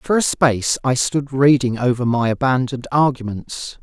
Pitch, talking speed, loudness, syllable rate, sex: 130 Hz, 155 wpm, -18 LUFS, 4.9 syllables/s, male